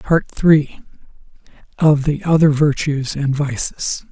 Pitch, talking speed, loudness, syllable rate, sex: 145 Hz, 115 wpm, -16 LUFS, 3.6 syllables/s, male